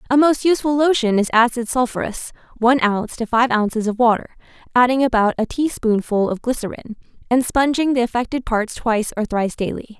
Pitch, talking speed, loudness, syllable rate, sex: 240 Hz, 175 wpm, -18 LUFS, 6.1 syllables/s, female